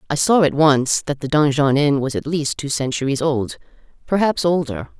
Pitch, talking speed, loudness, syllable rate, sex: 145 Hz, 180 wpm, -18 LUFS, 4.9 syllables/s, female